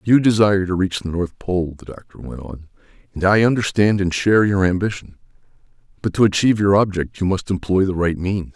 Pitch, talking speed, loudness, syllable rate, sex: 95 Hz, 205 wpm, -18 LUFS, 5.8 syllables/s, male